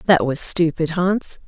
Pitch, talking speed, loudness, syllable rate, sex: 165 Hz, 160 wpm, -18 LUFS, 3.9 syllables/s, female